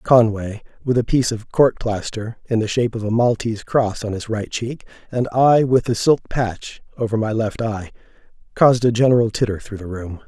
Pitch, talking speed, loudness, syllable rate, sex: 115 Hz, 205 wpm, -19 LUFS, 5.3 syllables/s, male